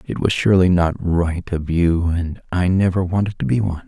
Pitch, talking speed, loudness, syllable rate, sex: 90 Hz, 215 wpm, -19 LUFS, 5.2 syllables/s, male